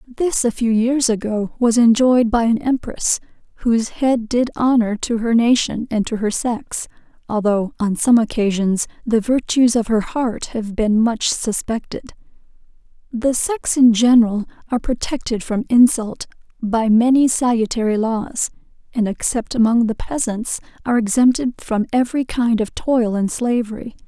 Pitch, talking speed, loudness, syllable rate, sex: 230 Hz, 150 wpm, -18 LUFS, 4.6 syllables/s, female